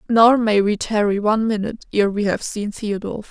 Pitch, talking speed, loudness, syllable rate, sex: 210 Hz, 200 wpm, -19 LUFS, 5.3 syllables/s, female